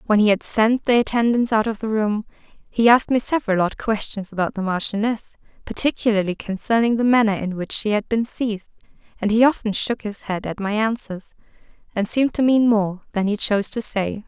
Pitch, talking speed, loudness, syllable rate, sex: 215 Hz, 200 wpm, -20 LUFS, 5.6 syllables/s, female